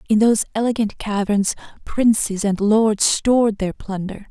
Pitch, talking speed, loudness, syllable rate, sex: 210 Hz, 140 wpm, -19 LUFS, 4.6 syllables/s, female